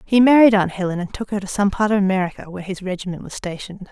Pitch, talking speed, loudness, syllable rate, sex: 195 Hz, 260 wpm, -19 LUFS, 7.1 syllables/s, female